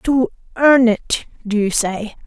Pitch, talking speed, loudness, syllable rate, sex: 230 Hz, 160 wpm, -17 LUFS, 3.5 syllables/s, female